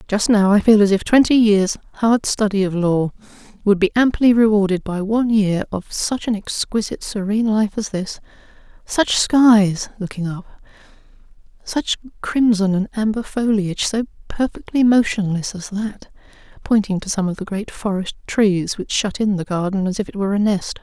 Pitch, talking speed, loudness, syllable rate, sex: 205 Hz, 165 wpm, -18 LUFS, 4.9 syllables/s, female